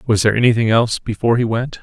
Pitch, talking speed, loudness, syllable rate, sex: 115 Hz, 230 wpm, -16 LUFS, 7.7 syllables/s, male